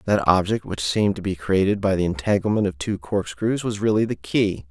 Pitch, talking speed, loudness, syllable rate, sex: 95 Hz, 215 wpm, -22 LUFS, 5.5 syllables/s, male